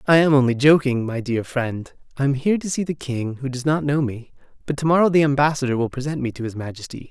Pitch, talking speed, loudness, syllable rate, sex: 140 Hz, 255 wpm, -21 LUFS, 6.2 syllables/s, male